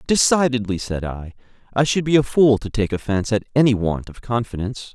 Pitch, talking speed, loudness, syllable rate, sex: 115 Hz, 195 wpm, -20 LUFS, 5.8 syllables/s, male